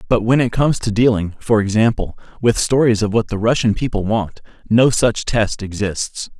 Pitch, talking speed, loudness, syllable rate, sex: 110 Hz, 190 wpm, -17 LUFS, 5.0 syllables/s, male